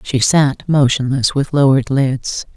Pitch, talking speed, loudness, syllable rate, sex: 135 Hz, 140 wpm, -15 LUFS, 4.2 syllables/s, female